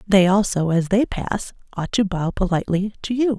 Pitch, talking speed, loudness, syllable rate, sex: 195 Hz, 195 wpm, -21 LUFS, 5.1 syllables/s, female